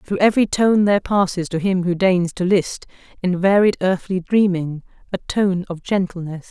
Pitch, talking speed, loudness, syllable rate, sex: 185 Hz, 175 wpm, -19 LUFS, 4.9 syllables/s, female